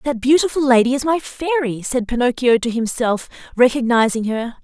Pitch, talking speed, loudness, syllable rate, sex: 250 Hz, 155 wpm, -17 LUFS, 5.2 syllables/s, female